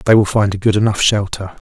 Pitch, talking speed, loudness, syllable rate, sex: 100 Hz, 250 wpm, -15 LUFS, 6.3 syllables/s, male